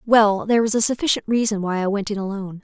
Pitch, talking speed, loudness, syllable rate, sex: 210 Hz, 250 wpm, -20 LUFS, 6.8 syllables/s, female